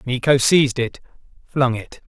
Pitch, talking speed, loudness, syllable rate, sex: 130 Hz, 145 wpm, -19 LUFS, 4.7 syllables/s, male